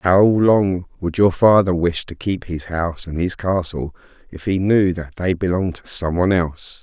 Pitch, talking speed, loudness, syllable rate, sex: 90 Hz, 200 wpm, -19 LUFS, 4.8 syllables/s, male